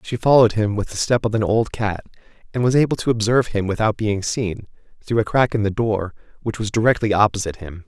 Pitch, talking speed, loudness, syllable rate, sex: 110 Hz, 230 wpm, -20 LUFS, 6.3 syllables/s, male